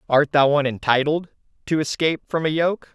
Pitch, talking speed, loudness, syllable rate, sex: 150 Hz, 185 wpm, -20 LUFS, 5.7 syllables/s, male